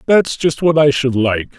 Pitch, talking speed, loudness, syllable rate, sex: 140 Hz, 225 wpm, -15 LUFS, 4.5 syllables/s, male